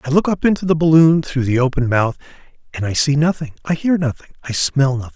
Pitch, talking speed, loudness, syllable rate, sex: 145 Hz, 235 wpm, -17 LUFS, 6.2 syllables/s, male